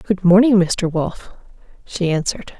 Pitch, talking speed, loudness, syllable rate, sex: 185 Hz, 140 wpm, -17 LUFS, 4.4 syllables/s, female